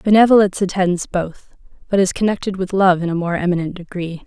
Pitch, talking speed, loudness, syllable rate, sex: 185 Hz, 185 wpm, -17 LUFS, 6.0 syllables/s, female